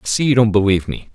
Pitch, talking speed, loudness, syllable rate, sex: 105 Hz, 315 wpm, -15 LUFS, 7.8 syllables/s, male